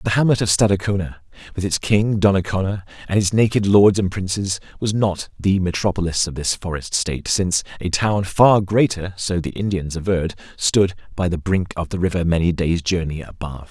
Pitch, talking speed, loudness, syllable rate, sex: 95 Hz, 175 wpm, -19 LUFS, 5.4 syllables/s, male